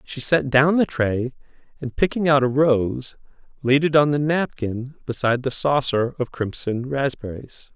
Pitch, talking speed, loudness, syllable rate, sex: 135 Hz, 160 wpm, -21 LUFS, 4.3 syllables/s, male